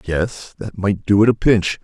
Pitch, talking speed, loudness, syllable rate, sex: 100 Hz, 230 wpm, -17 LUFS, 4.2 syllables/s, male